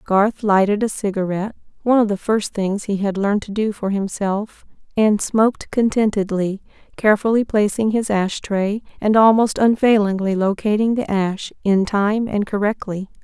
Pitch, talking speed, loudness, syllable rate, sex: 205 Hz, 145 wpm, -19 LUFS, 4.8 syllables/s, female